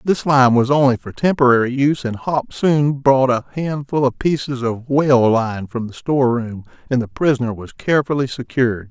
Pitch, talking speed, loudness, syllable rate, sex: 130 Hz, 190 wpm, -17 LUFS, 5.2 syllables/s, male